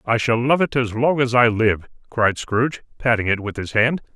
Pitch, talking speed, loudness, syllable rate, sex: 120 Hz, 230 wpm, -19 LUFS, 5.0 syllables/s, male